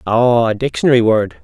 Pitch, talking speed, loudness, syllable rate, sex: 115 Hz, 165 wpm, -14 LUFS, 5.4 syllables/s, male